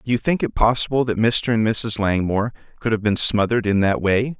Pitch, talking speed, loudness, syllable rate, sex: 110 Hz, 230 wpm, -20 LUFS, 5.7 syllables/s, male